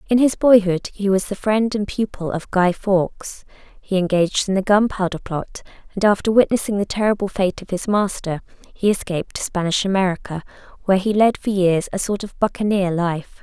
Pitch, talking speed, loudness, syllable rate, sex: 195 Hz, 190 wpm, -19 LUFS, 5.4 syllables/s, female